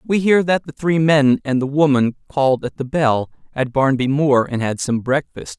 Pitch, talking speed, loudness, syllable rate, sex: 140 Hz, 215 wpm, -17 LUFS, 4.7 syllables/s, male